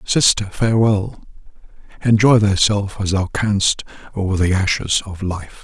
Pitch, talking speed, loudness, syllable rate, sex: 100 Hz, 130 wpm, -17 LUFS, 4.5 syllables/s, male